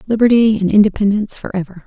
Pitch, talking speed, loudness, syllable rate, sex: 205 Hz, 160 wpm, -14 LUFS, 7.0 syllables/s, female